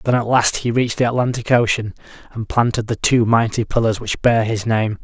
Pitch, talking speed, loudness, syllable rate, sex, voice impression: 115 Hz, 215 wpm, -18 LUFS, 5.5 syllables/s, male, masculine, adult-like, slightly middle-aged, slightly relaxed, slightly weak, slightly dark, slightly hard, muffled, slightly fluent, slightly raspy, cool, intellectual, sincere, very calm, mature, reassuring, slightly wild, slightly lively, slightly strict, slightly intense